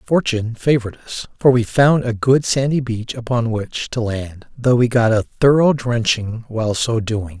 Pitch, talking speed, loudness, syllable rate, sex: 120 Hz, 185 wpm, -18 LUFS, 4.5 syllables/s, male